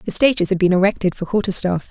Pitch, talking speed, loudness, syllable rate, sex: 190 Hz, 250 wpm, -17 LUFS, 6.8 syllables/s, female